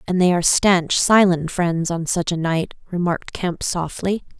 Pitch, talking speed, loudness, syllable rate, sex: 175 Hz, 175 wpm, -19 LUFS, 4.5 syllables/s, female